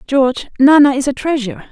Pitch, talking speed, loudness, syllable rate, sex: 275 Hz, 175 wpm, -13 LUFS, 6.3 syllables/s, female